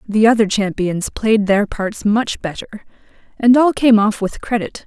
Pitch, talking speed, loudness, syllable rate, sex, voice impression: 215 Hz, 175 wpm, -16 LUFS, 4.6 syllables/s, female, feminine, adult-like, tensed, clear, fluent, intellectual, calm, elegant, slightly strict, slightly sharp